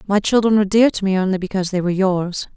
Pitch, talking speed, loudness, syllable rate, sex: 195 Hz, 260 wpm, -17 LUFS, 7.3 syllables/s, female